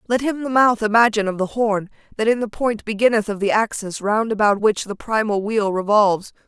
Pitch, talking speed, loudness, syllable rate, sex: 215 Hz, 215 wpm, -19 LUFS, 5.6 syllables/s, female